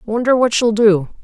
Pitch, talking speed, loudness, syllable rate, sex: 220 Hz, 195 wpm, -14 LUFS, 5.0 syllables/s, female